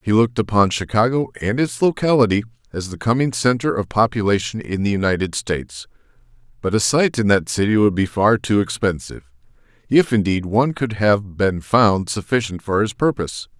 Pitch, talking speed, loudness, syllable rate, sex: 110 Hz, 170 wpm, -19 LUFS, 5.5 syllables/s, male